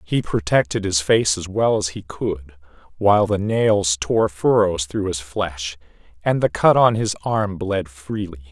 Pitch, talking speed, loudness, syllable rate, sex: 95 Hz, 175 wpm, -20 LUFS, 4.1 syllables/s, male